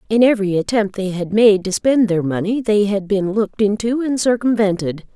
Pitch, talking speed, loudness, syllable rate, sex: 210 Hz, 200 wpm, -17 LUFS, 5.3 syllables/s, female